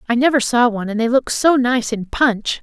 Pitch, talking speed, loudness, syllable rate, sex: 240 Hz, 250 wpm, -17 LUFS, 5.3 syllables/s, female